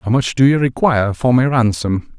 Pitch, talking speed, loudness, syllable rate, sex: 120 Hz, 220 wpm, -15 LUFS, 5.2 syllables/s, male